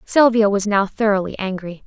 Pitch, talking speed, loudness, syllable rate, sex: 205 Hz, 160 wpm, -18 LUFS, 5.1 syllables/s, female